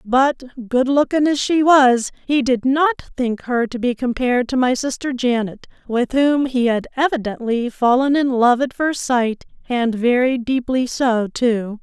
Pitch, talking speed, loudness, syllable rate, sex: 255 Hz, 175 wpm, -18 LUFS, 4.2 syllables/s, female